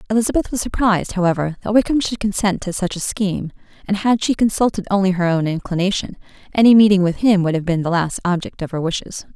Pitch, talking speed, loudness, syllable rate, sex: 195 Hz, 210 wpm, -18 LUFS, 6.4 syllables/s, female